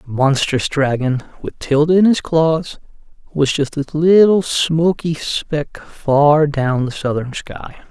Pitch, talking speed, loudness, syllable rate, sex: 150 Hz, 145 wpm, -16 LUFS, 3.6 syllables/s, male